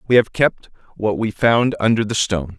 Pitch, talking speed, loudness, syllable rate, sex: 105 Hz, 210 wpm, -18 LUFS, 5.3 syllables/s, male